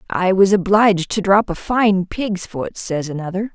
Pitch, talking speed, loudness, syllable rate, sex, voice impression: 195 Hz, 185 wpm, -17 LUFS, 4.5 syllables/s, female, very feminine, adult-like, sincere, friendly, slightly kind